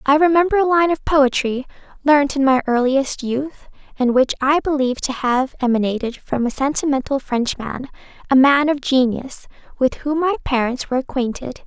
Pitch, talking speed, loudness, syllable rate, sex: 270 Hz, 165 wpm, -18 LUFS, 5.1 syllables/s, female